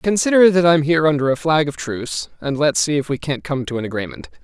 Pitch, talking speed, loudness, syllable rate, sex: 145 Hz, 255 wpm, -18 LUFS, 6.2 syllables/s, male